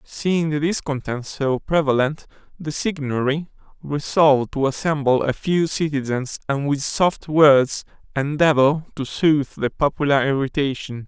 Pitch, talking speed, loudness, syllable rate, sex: 145 Hz, 125 wpm, -20 LUFS, 4.4 syllables/s, male